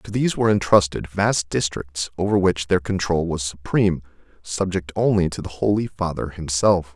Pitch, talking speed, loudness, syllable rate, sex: 90 Hz, 165 wpm, -21 LUFS, 5.2 syllables/s, male